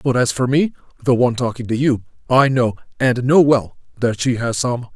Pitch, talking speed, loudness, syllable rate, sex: 125 Hz, 195 wpm, -18 LUFS, 5.3 syllables/s, male